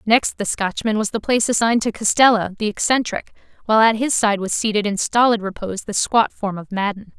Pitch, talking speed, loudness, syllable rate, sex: 215 Hz, 210 wpm, -19 LUFS, 5.9 syllables/s, female